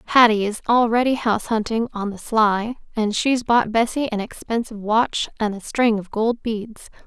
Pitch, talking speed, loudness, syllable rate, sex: 225 Hz, 180 wpm, -20 LUFS, 4.8 syllables/s, female